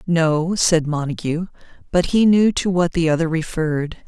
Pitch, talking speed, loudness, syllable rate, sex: 165 Hz, 160 wpm, -19 LUFS, 4.6 syllables/s, female